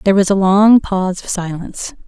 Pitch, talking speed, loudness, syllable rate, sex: 190 Hz, 200 wpm, -14 LUFS, 5.7 syllables/s, female